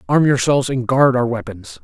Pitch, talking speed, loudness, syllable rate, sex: 120 Hz, 195 wpm, -16 LUFS, 5.4 syllables/s, male